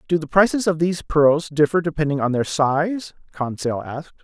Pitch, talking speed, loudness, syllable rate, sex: 155 Hz, 185 wpm, -20 LUFS, 5.3 syllables/s, male